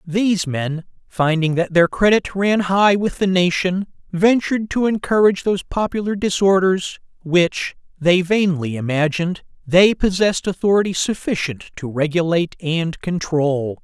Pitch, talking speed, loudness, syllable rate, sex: 180 Hz, 125 wpm, -18 LUFS, 4.7 syllables/s, male